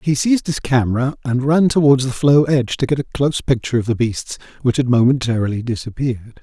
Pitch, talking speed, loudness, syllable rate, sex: 130 Hz, 205 wpm, -17 LUFS, 6.2 syllables/s, male